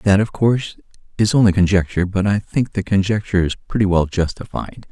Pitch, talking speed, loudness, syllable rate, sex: 100 Hz, 185 wpm, -18 LUFS, 5.8 syllables/s, male